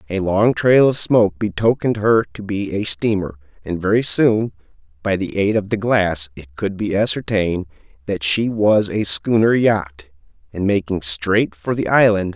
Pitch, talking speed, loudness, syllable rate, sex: 100 Hz, 175 wpm, -18 LUFS, 4.6 syllables/s, male